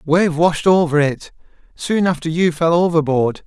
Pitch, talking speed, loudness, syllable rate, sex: 165 Hz, 140 wpm, -16 LUFS, 4.4 syllables/s, male